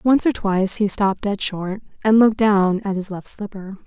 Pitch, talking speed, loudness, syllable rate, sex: 205 Hz, 215 wpm, -19 LUFS, 5.2 syllables/s, female